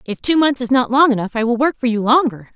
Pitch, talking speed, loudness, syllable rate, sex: 250 Hz, 305 wpm, -16 LUFS, 6.2 syllables/s, female